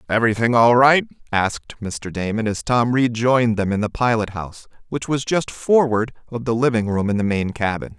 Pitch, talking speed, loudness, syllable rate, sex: 115 Hz, 195 wpm, -19 LUFS, 5.4 syllables/s, male